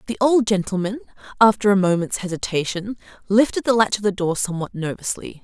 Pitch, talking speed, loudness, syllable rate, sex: 200 Hz, 165 wpm, -20 LUFS, 6.0 syllables/s, female